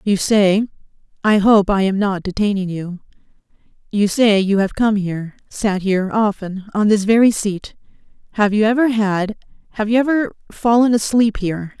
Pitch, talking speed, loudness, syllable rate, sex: 205 Hz, 145 wpm, -17 LUFS, 4.9 syllables/s, female